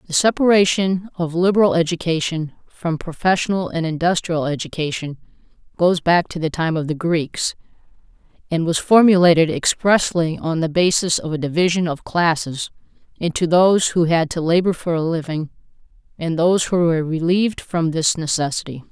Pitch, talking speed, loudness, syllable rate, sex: 170 Hz, 150 wpm, -18 LUFS, 5.2 syllables/s, female